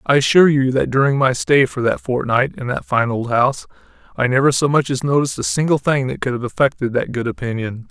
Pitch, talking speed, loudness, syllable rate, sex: 130 Hz, 235 wpm, -17 LUFS, 6.0 syllables/s, male